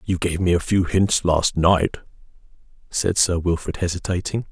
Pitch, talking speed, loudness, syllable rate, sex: 90 Hz, 160 wpm, -21 LUFS, 4.7 syllables/s, male